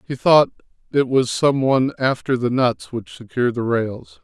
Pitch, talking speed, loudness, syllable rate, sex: 125 Hz, 185 wpm, -19 LUFS, 4.8 syllables/s, male